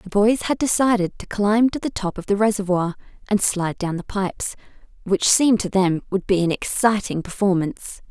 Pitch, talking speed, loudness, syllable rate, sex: 200 Hz, 190 wpm, -21 LUFS, 5.4 syllables/s, female